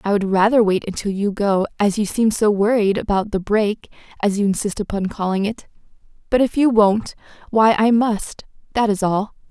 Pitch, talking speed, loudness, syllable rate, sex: 210 Hz, 195 wpm, -19 LUFS, 5.1 syllables/s, female